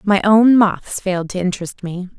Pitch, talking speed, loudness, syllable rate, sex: 195 Hz, 190 wpm, -16 LUFS, 5.0 syllables/s, female